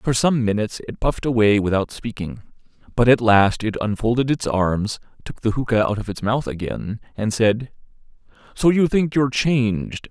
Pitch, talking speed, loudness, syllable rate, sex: 115 Hz, 190 wpm, -20 LUFS, 5.3 syllables/s, male